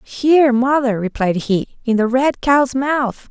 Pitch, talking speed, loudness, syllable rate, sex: 250 Hz, 165 wpm, -16 LUFS, 3.8 syllables/s, female